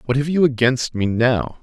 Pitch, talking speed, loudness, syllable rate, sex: 130 Hz, 220 wpm, -18 LUFS, 4.8 syllables/s, male